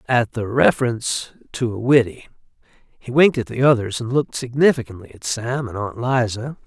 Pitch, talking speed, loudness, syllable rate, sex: 120 Hz, 170 wpm, -20 LUFS, 5.4 syllables/s, male